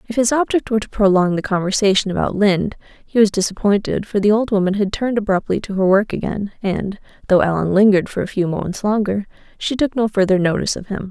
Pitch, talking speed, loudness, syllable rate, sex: 205 Hz, 215 wpm, -18 LUFS, 6.4 syllables/s, female